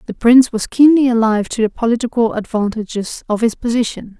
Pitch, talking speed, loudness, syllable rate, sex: 230 Hz, 170 wpm, -15 LUFS, 6.0 syllables/s, female